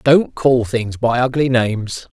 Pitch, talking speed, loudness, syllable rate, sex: 120 Hz, 165 wpm, -17 LUFS, 4.0 syllables/s, male